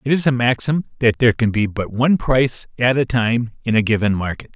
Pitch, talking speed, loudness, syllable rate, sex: 120 Hz, 235 wpm, -18 LUFS, 5.8 syllables/s, male